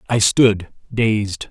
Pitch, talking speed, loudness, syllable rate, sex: 105 Hz, 120 wpm, -17 LUFS, 2.6 syllables/s, male